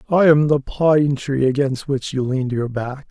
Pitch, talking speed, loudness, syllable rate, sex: 140 Hz, 210 wpm, -18 LUFS, 4.5 syllables/s, male